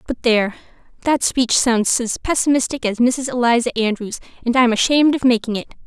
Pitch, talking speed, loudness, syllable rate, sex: 245 Hz, 175 wpm, -17 LUFS, 5.5 syllables/s, female